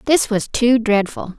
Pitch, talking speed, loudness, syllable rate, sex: 230 Hz, 175 wpm, -17 LUFS, 4.1 syllables/s, female